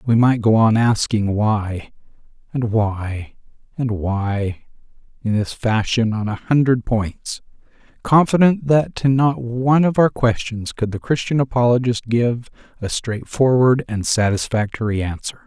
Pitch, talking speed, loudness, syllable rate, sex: 115 Hz, 135 wpm, -18 LUFS, 4.1 syllables/s, male